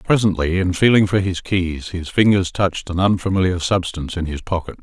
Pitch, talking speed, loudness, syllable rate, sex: 90 Hz, 185 wpm, -19 LUFS, 5.6 syllables/s, male